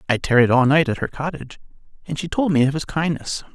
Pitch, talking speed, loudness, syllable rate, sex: 145 Hz, 235 wpm, -20 LUFS, 6.3 syllables/s, male